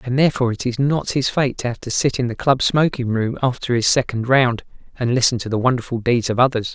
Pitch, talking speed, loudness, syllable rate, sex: 125 Hz, 250 wpm, -19 LUFS, 6.1 syllables/s, male